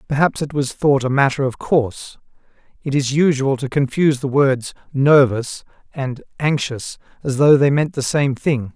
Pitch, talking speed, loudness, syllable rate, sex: 135 Hz, 170 wpm, -18 LUFS, 4.7 syllables/s, male